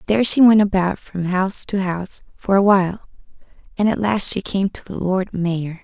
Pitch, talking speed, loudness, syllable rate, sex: 190 Hz, 205 wpm, -18 LUFS, 5.2 syllables/s, female